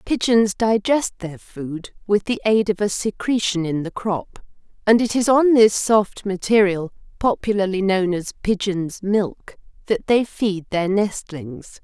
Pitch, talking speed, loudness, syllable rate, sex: 200 Hz, 150 wpm, -20 LUFS, 4.0 syllables/s, female